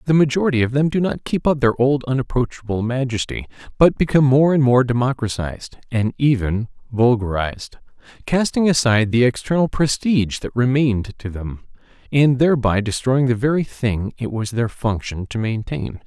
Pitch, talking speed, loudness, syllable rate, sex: 125 Hz, 155 wpm, -19 LUFS, 5.4 syllables/s, male